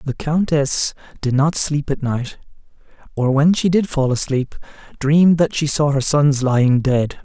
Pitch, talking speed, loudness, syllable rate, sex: 145 Hz, 175 wpm, -17 LUFS, 4.4 syllables/s, male